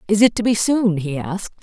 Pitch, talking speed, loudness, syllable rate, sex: 200 Hz, 260 wpm, -18 LUFS, 5.7 syllables/s, female